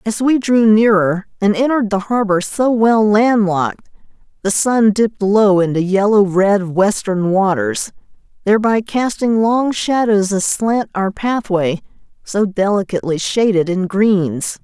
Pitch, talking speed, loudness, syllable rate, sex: 205 Hz, 135 wpm, -15 LUFS, 4.2 syllables/s, female